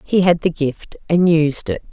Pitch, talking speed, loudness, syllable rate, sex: 160 Hz, 220 wpm, -17 LUFS, 4.2 syllables/s, female